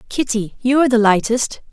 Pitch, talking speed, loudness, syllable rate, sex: 235 Hz, 175 wpm, -16 LUFS, 5.5 syllables/s, female